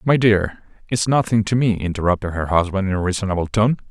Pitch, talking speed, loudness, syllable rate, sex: 100 Hz, 200 wpm, -19 LUFS, 6.1 syllables/s, male